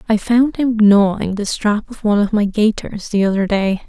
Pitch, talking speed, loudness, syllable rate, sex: 210 Hz, 215 wpm, -16 LUFS, 4.9 syllables/s, female